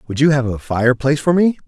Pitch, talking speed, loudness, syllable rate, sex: 135 Hz, 250 wpm, -16 LUFS, 6.9 syllables/s, male